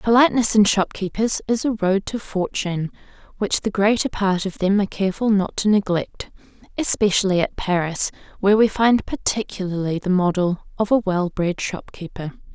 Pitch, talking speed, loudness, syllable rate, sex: 200 Hz, 160 wpm, -20 LUFS, 5.3 syllables/s, female